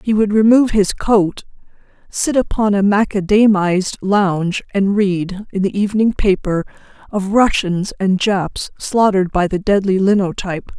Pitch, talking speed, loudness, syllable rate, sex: 200 Hz, 140 wpm, -16 LUFS, 4.7 syllables/s, female